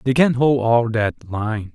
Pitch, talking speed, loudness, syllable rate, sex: 120 Hz, 205 wpm, -19 LUFS, 3.7 syllables/s, male